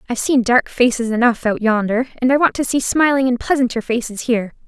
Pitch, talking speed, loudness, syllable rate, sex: 245 Hz, 220 wpm, -17 LUFS, 6.1 syllables/s, female